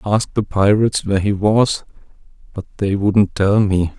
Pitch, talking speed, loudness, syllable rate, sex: 100 Hz, 180 wpm, -17 LUFS, 5.3 syllables/s, male